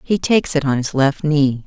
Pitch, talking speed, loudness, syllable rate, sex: 145 Hz, 250 wpm, -17 LUFS, 5.1 syllables/s, female